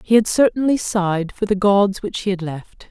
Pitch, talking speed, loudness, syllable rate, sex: 200 Hz, 225 wpm, -18 LUFS, 5.0 syllables/s, female